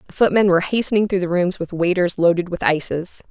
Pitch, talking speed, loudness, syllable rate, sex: 180 Hz, 220 wpm, -18 LUFS, 6.1 syllables/s, female